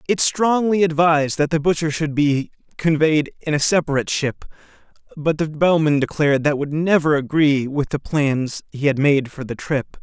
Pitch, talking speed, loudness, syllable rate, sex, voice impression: 150 Hz, 180 wpm, -19 LUFS, 4.9 syllables/s, male, masculine, adult-like, slightly powerful, refreshing, slightly sincere, slightly intense